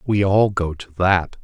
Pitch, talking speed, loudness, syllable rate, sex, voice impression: 95 Hz, 210 wpm, -19 LUFS, 3.7 syllables/s, male, very masculine, very adult-like, middle-aged, very thick, tensed, slightly weak, slightly dark, soft, slightly muffled, fluent, very cool, intellectual, slightly refreshing, slightly sincere, calm, very mature, friendly, reassuring, unique, very wild, sweet, slightly kind, slightly modest